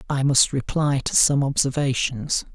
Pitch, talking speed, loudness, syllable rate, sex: 135 Hz, 140 wpm, -21 LUFS, 4.4 syllables/s, male